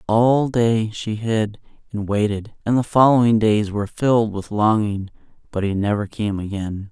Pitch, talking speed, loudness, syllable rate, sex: 110 Hz, 165 wpm, -20 LUFS, 4.6 syllables/s, male